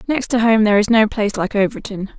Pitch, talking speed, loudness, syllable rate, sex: 215 Hz, 245 wpm, -16 LUFS, 6.7 syllables/s, female